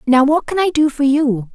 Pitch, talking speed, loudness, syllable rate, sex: 280 Hz, 270 wpm, -15 LUFS, 5.1 syllables/s, female